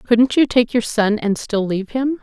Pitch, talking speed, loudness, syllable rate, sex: 230 Hz, 240 wpm, -18 LUFS, 4.8 syllables/s, female